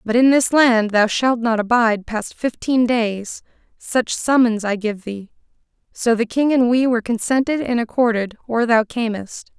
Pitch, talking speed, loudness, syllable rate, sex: 230 Hz, 175 wpm, -18 LUFS, 4.5 syllables/s, female